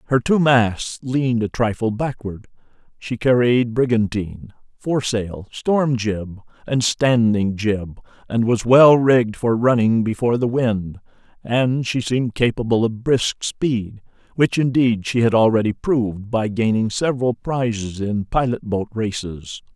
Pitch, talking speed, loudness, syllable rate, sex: 115 Hz, 140 wpm, -19 LUFS, 4.2 syllables/s, male